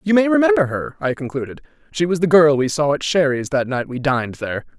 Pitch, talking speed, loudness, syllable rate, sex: 150 Hz, 240 wpm, -18 LUFS, 6.2 syllables/s, male